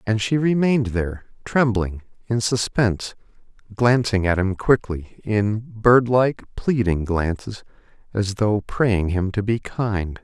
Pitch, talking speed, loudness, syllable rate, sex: 110 Hz, 130 wpm, -21 LUFS, 4.0 syllables/s, male